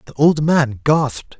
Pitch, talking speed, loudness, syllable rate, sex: 140 Hz, 170 wpm, -16 LUFS, 4.3 syllables/s, male